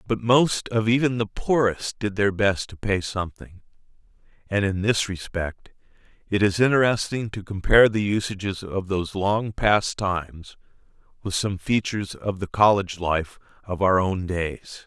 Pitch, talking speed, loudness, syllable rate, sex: 100 Hz, 155 wpm, -23 LUFS, 4.6 syllables/s, male